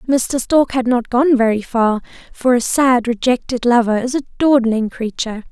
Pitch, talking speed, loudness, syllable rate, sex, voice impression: 245 Hz, 175 wpm, -16 LUFS, 4.8 syllables/s, female, feminine, slightly young, thin, slightly tensed, powerful, bright, soft, slightly raspy, intellectual, calm, friendly, reassuring, slightly lively, kind, slightly modest